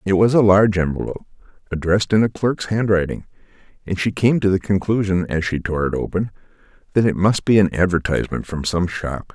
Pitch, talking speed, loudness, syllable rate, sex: 95 Hz, 195 wpm, -19 LUFS, 6.0 syllables/s, male